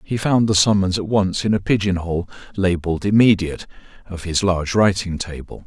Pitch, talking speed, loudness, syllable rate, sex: 95 Hz, 180 wpm, -19 LUFS, 5.5 syllables/s, male